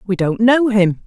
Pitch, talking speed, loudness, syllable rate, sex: 210 Hz, 225 wpm, -15 LUFS, 4.1 syllables/s, female